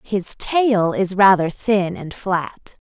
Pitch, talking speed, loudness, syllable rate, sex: 195 Hz, 145 wpm, -18 LUFS, 3.0 syllables/s, female